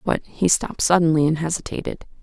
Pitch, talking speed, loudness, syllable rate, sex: 160 Hz, 160 wpm, -20 LUFS, 6.1 syllables/s, female